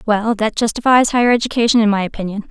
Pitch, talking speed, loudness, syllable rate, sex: 220 Hz, 190 wpm, -15 LUFS, 6.8 syllables/s, female